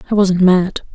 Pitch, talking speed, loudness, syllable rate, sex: 185 Hz, 190 wpm, -14 LUFS, 4.6 syllables/s, female